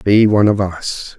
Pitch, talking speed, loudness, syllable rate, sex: 100 Hz, 205 wpm, -15 LUFS, 4.4 syllables/s, male